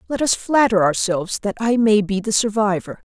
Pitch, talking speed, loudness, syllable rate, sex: 210 Hz, 195 wpm, -18 LUFS, 5.3 syllables/s, female